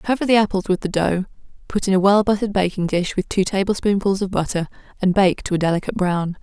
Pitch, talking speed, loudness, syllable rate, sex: 190 Hz, 225 wpm, -19 LUFS, 6.5 syllables/s, female